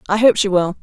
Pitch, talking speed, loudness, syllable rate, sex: 200 Hz, 290 wpm, -15 LUFS, 6.6 syllables/s, female